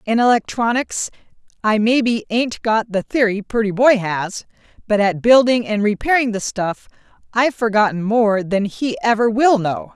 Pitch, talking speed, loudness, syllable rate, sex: 220 Hz, 155 wpm, -17 LUFS, 4.6 syllables/s, female